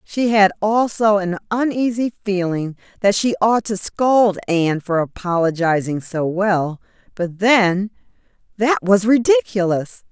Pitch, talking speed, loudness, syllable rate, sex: 200 Hz, 125 wpm, -18 LUFS, 4.0 syllables/s, female